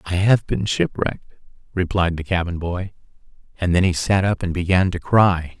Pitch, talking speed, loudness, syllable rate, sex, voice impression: 90 Hz, 180 wpm, -20 LUFS, 5.1 syllables/s, male, masculine, adult-like, slightly thin, tensed, bright, slightly hard, clear, slightly nasal, cool, calm, friendly, reassuring, wild, lively, slightly kind